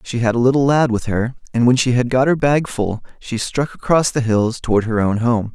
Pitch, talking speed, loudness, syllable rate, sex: 125 Hz, 260 wpm, -17 LUFS, 5.3 syllables/s, male